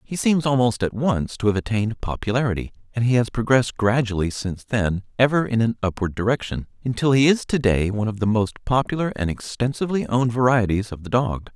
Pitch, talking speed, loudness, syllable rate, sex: 115 Hz, 195 wpm, -22 LUFS, 6.0 syllables/s, male